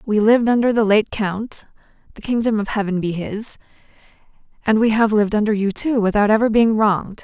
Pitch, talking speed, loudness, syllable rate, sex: 215 Hz, 175 wpm, -18 LUFS, 5.8 syllables/s, female